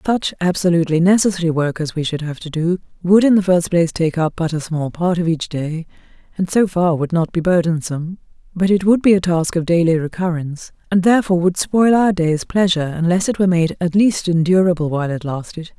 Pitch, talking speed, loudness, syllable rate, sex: 175 Hz, 215 wpm, -17 LUFS, 5.9 syllables/s, female